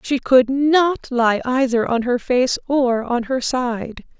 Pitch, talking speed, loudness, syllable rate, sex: 250 Hz, 170 wpm, -18 LUFS, 3.5 syllables/s, female